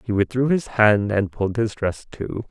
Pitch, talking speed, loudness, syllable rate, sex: 110 Hz, 215 wpm, -21 LUFS, 4.7 syllables/s, male